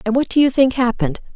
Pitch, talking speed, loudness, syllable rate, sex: 245 Hz, 265 wpm, -17 LUFS, 7.0 syllables/s, female